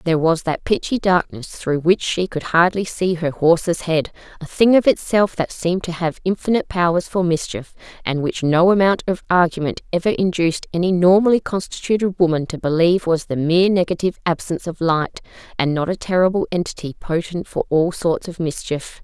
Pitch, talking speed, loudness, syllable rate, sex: 175 Hz, 180 wpm, -19 LUFS, 5.6 syllables/s, female